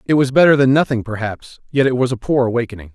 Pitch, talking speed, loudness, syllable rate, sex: 125 Hz, 245 wpm, -16 LUFS, 6.6 syllables/s, male